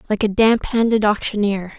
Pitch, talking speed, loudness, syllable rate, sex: 210 Hz, 170 wpm, -18 LUFS, 5.2 syllables/s, female